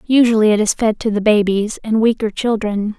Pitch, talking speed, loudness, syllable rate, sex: 215 Hz, 200 wpm, -16 LUFS, 5.3 syllables/s, female